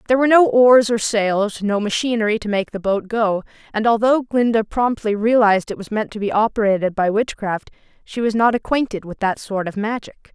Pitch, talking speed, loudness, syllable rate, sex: 215 Hz, 205 wpm, -18 LUFS, 5.5 syllables/s, female